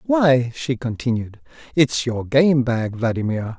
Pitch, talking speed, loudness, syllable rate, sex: 130 Hz, 135 wpm, -20 LUFS, 3.8 syllables/s, male